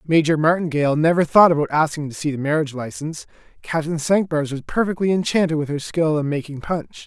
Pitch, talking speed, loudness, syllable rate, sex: 155 Hz, 185 wpm, -20 LUFS, 6.1 syllables/s, male